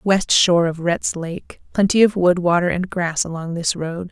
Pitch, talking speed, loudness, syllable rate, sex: 175 Hz, 190 wpm, -18 LUFS, 4.6 syllables/s, female